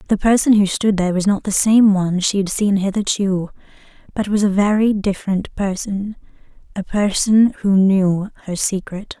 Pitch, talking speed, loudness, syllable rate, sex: 200 Hz, 165 wpm, -17 LUFS, 4.9 syllables/s, female